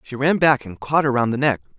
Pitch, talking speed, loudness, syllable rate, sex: 130 Hz, 305 wpm, -19 LUFS, 5.8 syllables/s, male